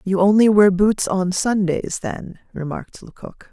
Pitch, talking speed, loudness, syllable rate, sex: 195 Hz, 155 wpm, -18 LUFS, 4.3 syllables/s, female